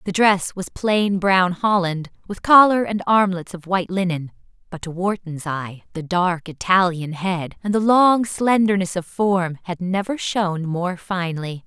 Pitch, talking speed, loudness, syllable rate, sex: 185 Hz, 165 wpm, -20 LUFS, 4.2 syllables/s, female